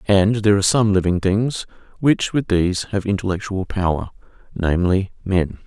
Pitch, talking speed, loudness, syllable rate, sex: 100 Hz, 140 wpm, -19 LUFS, 5.2 syllables/s, male